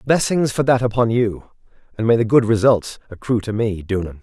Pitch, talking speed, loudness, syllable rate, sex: 115 Hz, 200 wpm, -18 LUFS, 5.8 syllables/s, male